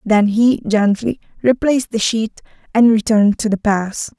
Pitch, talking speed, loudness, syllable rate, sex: 220 Hz, 160 wpm, -16 LUFS, 5.3 syllables/s, female